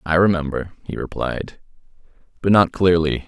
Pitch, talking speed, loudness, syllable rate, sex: 90 Hz, 130 wpm, -20 LUFS, 4.9 syllables/s, male